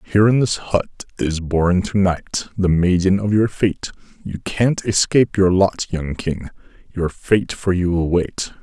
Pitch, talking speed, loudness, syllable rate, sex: 95 Hz, 180 wpm, -19 LUFS, 4.3 syllables/s, male